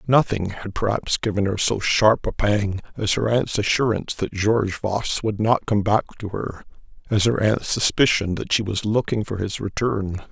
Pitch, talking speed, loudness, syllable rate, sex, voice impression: 105 Hz, 190 wpm, -22 LUFS, 4.7 syllables/s, male, very masculine, very adult-like, thick, slightly muffled, cool, slightly sincere, calm, slightly wild